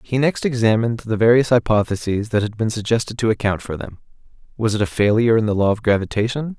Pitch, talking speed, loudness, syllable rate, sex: 110 Hz, 200 wpm, -19 LUFS, 6.4 syllables/s, male